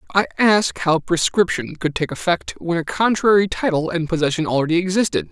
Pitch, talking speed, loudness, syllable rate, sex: 175 Hz, 170 wpm, -19 LUFS, 5.7 syllables/s, male